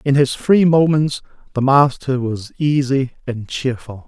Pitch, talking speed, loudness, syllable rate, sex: 135 Hz, 145 wpm, -17 LUFS, 4.1 syllables/s, male